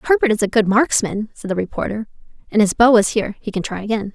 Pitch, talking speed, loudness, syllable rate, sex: 215 Hz, 245 wpm, -18 LUFS, 6.7 syllables/s, female